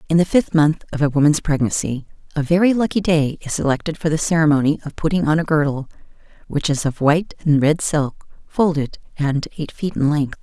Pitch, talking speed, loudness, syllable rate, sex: 155 Hz, 200 wpm, -19 LUFS, 5.7 syllables/s, female